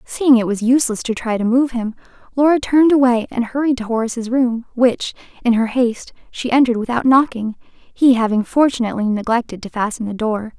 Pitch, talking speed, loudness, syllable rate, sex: 240 Hz, 185 wpm, -17 LUFS, 5.7 syllables/s, female